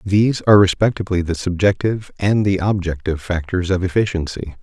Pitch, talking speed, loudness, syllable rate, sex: 95 Hz, 145 wpm, -18 LUFS, 6.2 syllables/s, male